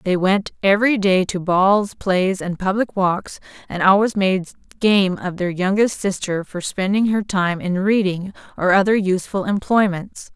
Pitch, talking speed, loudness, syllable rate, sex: 190 Hz, 160 wpm, -19 LUFS, 4.4 syllables/s, female